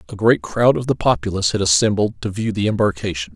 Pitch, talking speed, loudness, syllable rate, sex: 100 Hz, 215 wpm, -18 LUFS, 6.3 syllables/s, male